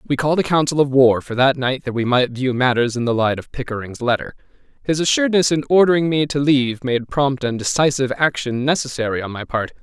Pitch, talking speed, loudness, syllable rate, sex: 135 Hz, 220 wpm, -18 LUFS, 6.0 syllables/s, male